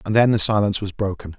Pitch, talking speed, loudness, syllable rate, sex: 105 Hz, 260 wpm, -19 LUFS, 7.0 syllables/s, male